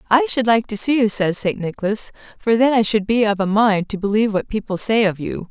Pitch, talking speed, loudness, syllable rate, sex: 215 Hz, 260 wpm, -18 LUFS, 5.7 syllables/s, female